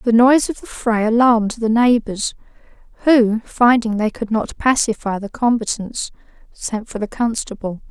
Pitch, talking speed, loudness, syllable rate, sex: 225 Hz, 150 wpm, -18 LUFS, 4.6 syllables/s, female